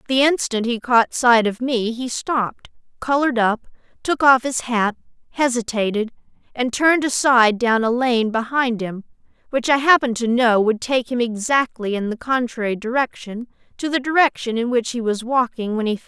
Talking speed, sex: 185 wpm, female